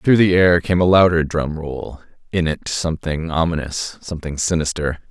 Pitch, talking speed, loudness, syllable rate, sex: 80 Hz, 155 wpm, -18 LUFS, 5.0 syllables/s, male